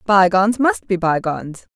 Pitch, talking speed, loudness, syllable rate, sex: 200 Hz, 135 wpm, -17 LUFS, 5.1 syllables/s, female